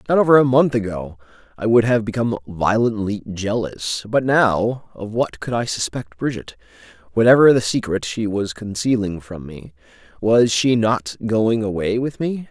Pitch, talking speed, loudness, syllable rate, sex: 110 Hz, 165 wpm, -19 LUFS, 4.7 syllables/s, male